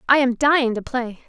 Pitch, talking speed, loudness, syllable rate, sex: 255 Hz, 235 wpm, -19 LUFS, 5.4 syllables/s, female